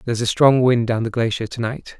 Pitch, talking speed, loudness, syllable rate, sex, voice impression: 120 Hz, 300 wpm, -19 LUFS, 6.5 syllables/s, male, very masculine, slightly adult-like, thick, slightly relaxed, weak, dark, soft, slightly muffled, fluent, slightly raspy, cool, very intellectual, slightly refreshing, sincere, very calm, friendly, very reassuring, slightly unique, elegant, slightly wild, sweet, lively, kind, slightly intense, slightly modest